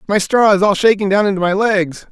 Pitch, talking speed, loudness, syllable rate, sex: 200 Hz, 255 wpm, -14 LUFS, 5.7 syllables/s, male